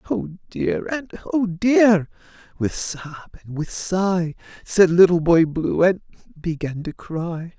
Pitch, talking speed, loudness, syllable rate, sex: 165 Hz, 140 wpm, -20 LUFS, 3.5 syllables/s, male